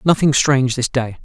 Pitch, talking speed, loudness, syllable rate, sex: 130 Hz, 195 wpm, -16 LUFS, 5.5 syllables/s, male